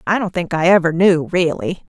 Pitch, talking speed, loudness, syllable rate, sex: 175 Hz, 210 wpm, -16 LUFS, 5.2 syllables/s, female